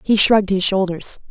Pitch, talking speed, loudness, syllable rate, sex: 195 Hz, 185 wpm, -16 LUFS, 5.3 syllables/s, female